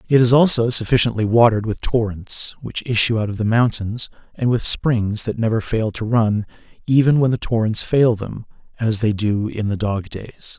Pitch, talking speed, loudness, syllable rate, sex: 115 Hz, 195 wpm, -18 LUFS, 4.9 syllables/s, male